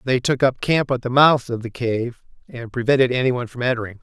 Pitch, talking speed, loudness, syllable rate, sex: 125 Hz, 225 wpm, -20 LUFS, 6.2 syllables/s, male